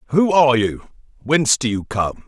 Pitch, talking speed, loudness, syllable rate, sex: 130 Hz, 185 wpm, -17 LUFS, 5.3 syllables/s, male